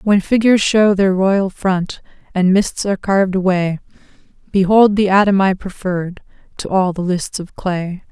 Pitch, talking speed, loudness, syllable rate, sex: 190 Hz, 165 wpm, -16 LUFS, 4.7 syllables/s, female